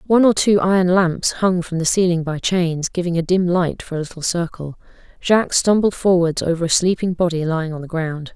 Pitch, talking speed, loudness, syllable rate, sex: 175 Hz, 215 wpm, -18 LUFS, 5.5 syllables/s, female